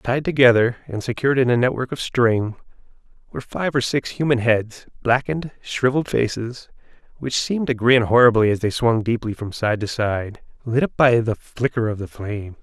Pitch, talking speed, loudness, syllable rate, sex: 120 Hz, 185 wpm, -20 LUFS, 5.3 syllables/s, male